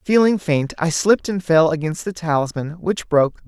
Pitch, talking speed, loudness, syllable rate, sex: 170 Hz, 190 wpm, -19 LUFS, 5.3 syllables/s, male